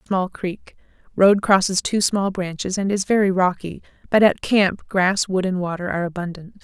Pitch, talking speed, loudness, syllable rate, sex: 190 Hz, 170 wpm, -20 LUFS, 4.9 syllables/s, female